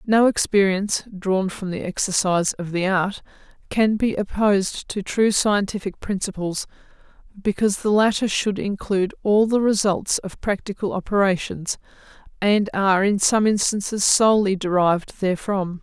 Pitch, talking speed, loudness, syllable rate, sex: 200 Hz, 135 wpm, -21 LUFS, 4.9 syllables/s, female